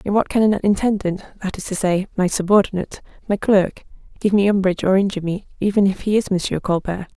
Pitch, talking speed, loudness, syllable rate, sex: 195 Hz, 210 wpm, -19 LUFS, 6.2 syllables/s, female